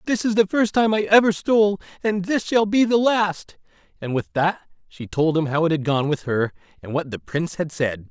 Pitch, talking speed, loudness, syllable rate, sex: 180 Hz, 235 wpm, -21 LUFS, 4.9 syllables/s, male